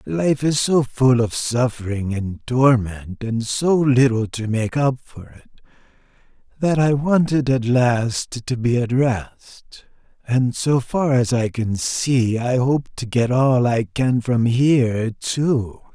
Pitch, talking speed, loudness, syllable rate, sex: 125 Hz, 160 wpm, -19 LUFS, 3.5 syllables/s, male